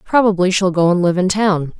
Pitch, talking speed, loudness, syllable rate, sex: 185 Hz, 235 wpm, -15 LUFS, 5.4 syllables/s, female